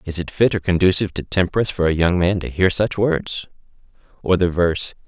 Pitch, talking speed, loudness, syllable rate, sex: 90 Hz, 215 wpm, -19 LUFS, 6.0 syllables/s, male